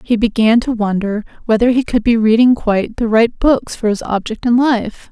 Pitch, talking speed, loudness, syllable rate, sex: 225 Hz, 210 wpm, -14 LUFS, 5.0 syllables/s, female